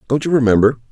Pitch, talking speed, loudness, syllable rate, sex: 125 Hz, 195 wpm, -15 LUFS, 7.9 syllables/s, male